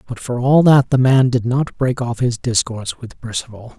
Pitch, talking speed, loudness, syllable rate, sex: 125 Hz, 220 wpm, -17 LUFS, 4.9 syllables/s, male